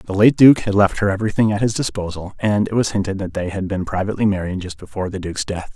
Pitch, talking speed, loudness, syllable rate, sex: 100 Hz, 260 wpm, -19 LUFS, 6.8 syllables/s, male